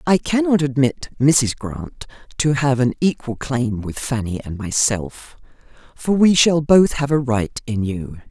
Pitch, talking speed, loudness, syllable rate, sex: 130 Hz, 165 wpm, -19 LUFS, 4.0 syllables/s, female